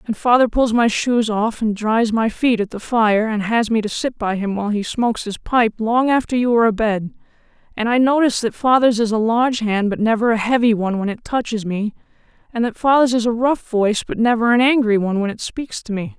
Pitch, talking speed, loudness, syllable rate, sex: 225 Hz, 240 wpm, -18 LUFS, 5.7 syllables/s, female